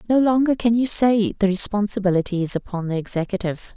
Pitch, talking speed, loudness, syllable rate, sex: 205 Hz, 175 wpm, -20 LUFS, 6.2 syllables/s, female